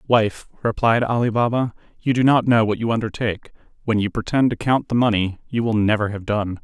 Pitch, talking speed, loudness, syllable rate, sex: 115 Hz, 210 wpm, -20 LUFS, 5.7 syllables/s, male